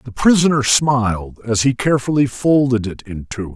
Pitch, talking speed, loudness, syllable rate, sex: 120 Hz, 170 wpm, -16 LUFS, 5.0 syllables/s, male